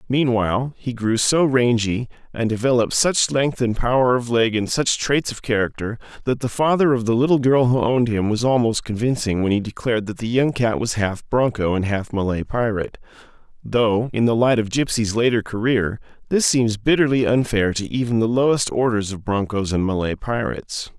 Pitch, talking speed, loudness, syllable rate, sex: 115 Hz, 190 wpm, -20 LUFS, 5.3 syllables/s, male